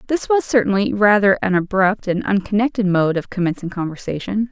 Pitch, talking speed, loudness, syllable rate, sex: 200 Hz, 160 wpm, -18 LUFS, 5.6 syllables/s, female